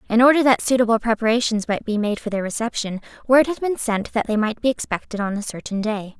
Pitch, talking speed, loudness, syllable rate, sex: 225 Hz, 235 wpm, -20 LUFS, 6.1 syllables/s, female